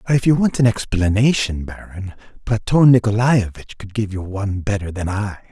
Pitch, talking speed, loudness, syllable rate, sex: 105 Hz, 165 wpm, -18 LUFS, 5.1 syllables/s, male